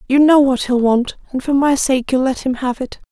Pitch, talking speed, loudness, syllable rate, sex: 265 Hz, 270 wpm, -16 LUFS, 5.2 syllables/s, female